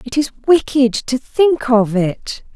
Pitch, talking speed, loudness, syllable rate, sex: 255 Hz, 165 wpm, -15 LUFS, 3.7 syllables/s, female